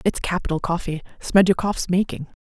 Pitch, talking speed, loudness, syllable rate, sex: 175 Hz, 125 wpm, -22 LUFS, 5.6 syllables/s, female